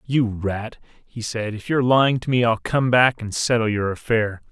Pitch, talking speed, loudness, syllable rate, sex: 115 Hz, 215 wpm, -21 LUFS, 4.9 syllables/s, male